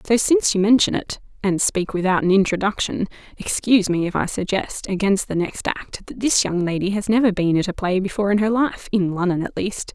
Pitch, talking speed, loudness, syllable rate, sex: 195 Hz, 215 wpm, -20 LUFS, 5.6 syllables/s, female